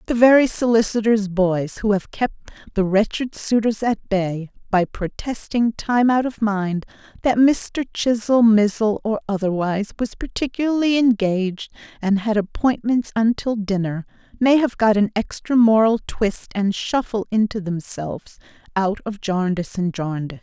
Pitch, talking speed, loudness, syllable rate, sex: 215 Hz, 140 wpm, -20 LUFS, 4.5 syllables/s, female